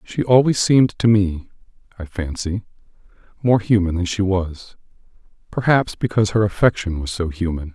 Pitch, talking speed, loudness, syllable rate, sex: 100 Hz, 145 wpm, -19 LUFS, 5.1 syllables/s, male